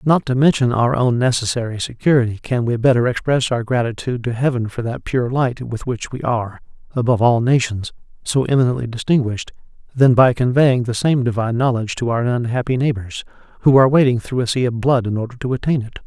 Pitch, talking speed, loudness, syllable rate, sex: 125 Hz, 200 wpm, -18 LUFS, 6.1 syllables/s, male